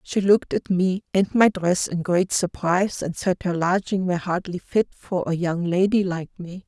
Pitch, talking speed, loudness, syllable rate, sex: 185 Hz, 205 wpm, -22 LUFS, 4.9 syllables/s, female